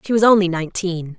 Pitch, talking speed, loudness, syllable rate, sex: 185 Hz, 205 wpm, -17 LUFS, 6.4 syllables/s, female